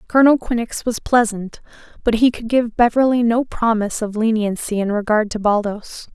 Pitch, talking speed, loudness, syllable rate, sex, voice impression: 225 Hz, 165 wpm, -18 LUFS, 5.2 syllables/s, female, feminine, adult-like, slightly relaxed, slightly bright, soft, slightly muffled, raspy, intellectual, calm, reassuring, elegant, kind, slightly modest